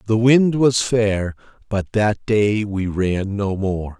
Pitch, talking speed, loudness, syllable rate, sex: 105 Hz, 165 wpm, -19 LUFS, 3.2 syllables/s, male